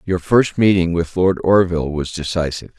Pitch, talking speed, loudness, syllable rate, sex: 90 Hz, 170 wpm, -17 LUFS, 5.3 syllables/s, male